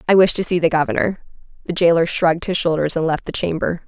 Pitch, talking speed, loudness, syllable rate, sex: 170 Hz, 230 wpm, -18 LUFS, 6.4 syllables/s, female